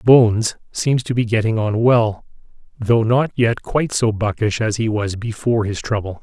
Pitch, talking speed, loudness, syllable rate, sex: 115 Hz, 185 wpm, -18 LUFS, 4.8 syllables/s, male